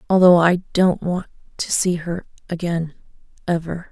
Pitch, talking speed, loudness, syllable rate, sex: 175 Hz, 140 wpm, -19 LUFS, 4.5 syllables/s, female